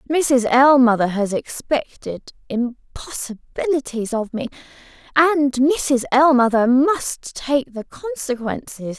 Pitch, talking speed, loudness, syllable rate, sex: 260 Hz, 95 wpm, -19 LUFS, 3.6 syllables/s, female